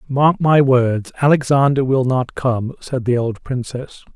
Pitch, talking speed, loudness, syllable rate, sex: 130 Hz, 160 wpm, -17 LUFS, 4.0 syllables/s, male